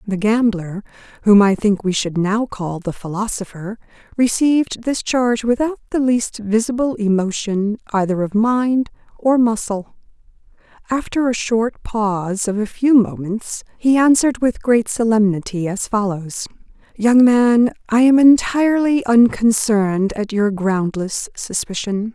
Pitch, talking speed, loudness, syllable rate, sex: 220 Hz, 135 wpm, -17 LUFS, 4.3 syllables/s, female